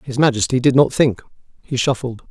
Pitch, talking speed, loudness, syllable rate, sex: 125 Hz, 180 wpm, -17 LUFS, 5.6 syllables/s, male